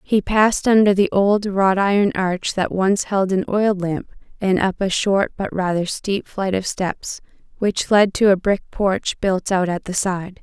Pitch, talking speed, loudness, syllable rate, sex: 195 Hz, 200 wpm, -19 LUFS, 4.2 syllables/s, female